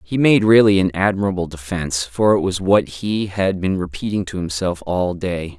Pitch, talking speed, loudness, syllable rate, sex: 95 Hz, 195 wpm, -18 LUFS, 5.0 syllables/s, male